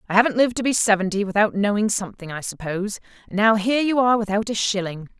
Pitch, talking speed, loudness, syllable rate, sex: 210 Hz, 220 wpm, -21 LUFS, 7.1 syllables/s, female